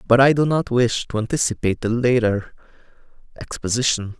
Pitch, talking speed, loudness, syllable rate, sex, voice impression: 120 Hz, 145 wpm, -20 LUFS, 5.7 syllables/s, male, very masculine, adult-like, slightly middle-aged, thick, slightly tensed, slightly powerful, bright, slightly hard, clear, slightly fluent, cool, slightly intellectual, slightly refreshing, very sincere, calm, slightly mature, slightly friendly, reassuring, slightly unique, slightly wild, kind, very modest